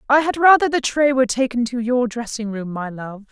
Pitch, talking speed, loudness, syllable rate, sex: 245 Hz, 235 wpm, -18 LUFS, 5.5 syllables/s, female